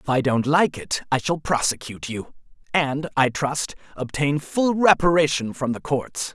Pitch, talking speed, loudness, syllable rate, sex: 145 Hz, 170 wpm, -22 LUFS, 4.5 syllables/s, male